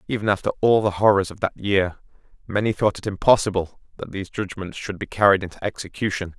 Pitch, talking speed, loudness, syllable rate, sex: 100 Hz, 190 wpm, -22 LUFS, 6.2 syllables/s, male